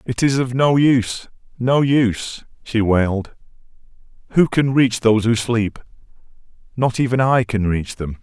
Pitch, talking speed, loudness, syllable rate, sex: 120 Hz, 145 wpm, -18 LUFS, 4.6 syllables/s, male